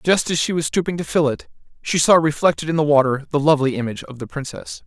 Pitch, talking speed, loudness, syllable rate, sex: 150 Hz, 245 wpm, -19 LUFS, 6.6 syllables/s, male